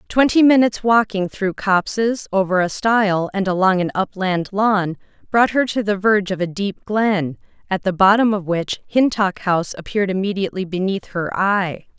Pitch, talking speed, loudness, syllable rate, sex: 200 Hz, 170 wpm, -18 LUFS, 5.0 syllables/s, female